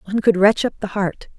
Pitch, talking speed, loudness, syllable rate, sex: 200 Hz, 260 wpm, -18 LUFS, 6.3 syllables/s, female